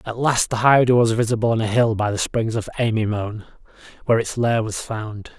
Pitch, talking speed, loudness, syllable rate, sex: 115 Hz, 210 wpm, -20 LUFS, 5.8 syllables/s, male